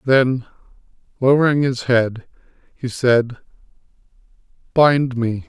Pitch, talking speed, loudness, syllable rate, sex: 125 Hz, 90 wpm, -18 LUFS, 3.6 syllables/s, male